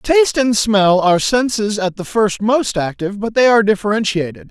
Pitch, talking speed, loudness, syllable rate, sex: 210 Hz, 185 wpm, -15 LUFS, 5.4 syllables/s, male